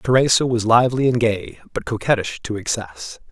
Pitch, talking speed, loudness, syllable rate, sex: 110 Hz, 165 wpm, -19 LUFS, 5.3 syllables/s, male